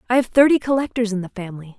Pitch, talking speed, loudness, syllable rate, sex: 225 Hz, 235 wpm, -18 LUFS, 7.6 syllables/s, female